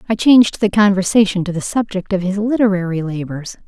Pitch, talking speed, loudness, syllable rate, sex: 195 Hz, 180 wpm, -16 LUFS, 5.9 syllables/s, female